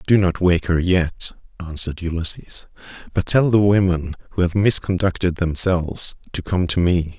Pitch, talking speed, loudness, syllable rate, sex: 90 Hz, 160 wpm, -19 LUFS, 4.9 syllables/s, male